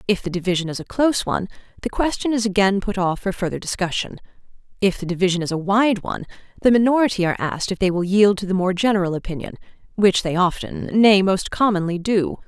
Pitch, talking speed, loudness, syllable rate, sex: 195 Hz, 205 wpm, -20 LUFS, 6.4 syllables/s, female